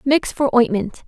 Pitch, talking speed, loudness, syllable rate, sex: 250 Hz, 165 wpm, -18 LUFS, 4.2 syllables/s, female